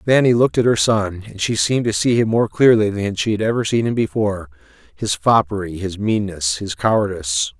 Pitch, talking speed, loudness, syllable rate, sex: 110 Hz, 195 wpm, -18 LUFS, 5.7 syllables/s, male